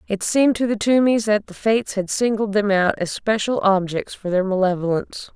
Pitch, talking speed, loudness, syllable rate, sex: 205 Hz, 200 wpm, -20 LUFS, 5.4 syllables/s, female